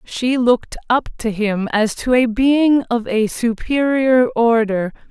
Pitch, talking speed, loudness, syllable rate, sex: 235 Hz, 155 wpm, -17 LUFS, 3.7 syllables/s, female